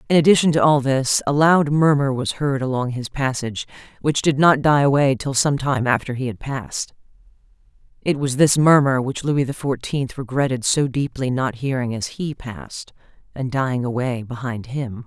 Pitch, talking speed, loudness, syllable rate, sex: 135 Hz, 185 wpm, -20 LUFS, 5.0 syllables/s, female